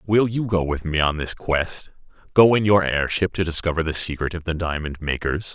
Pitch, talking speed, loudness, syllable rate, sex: 85 Hz, 205 wpm, -21 LUFS, 5.1 syllables/s, male